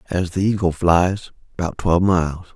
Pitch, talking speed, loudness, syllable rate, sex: 90 Hz, 165 wpm, -19 LUFS, 4.9 syllables/s, male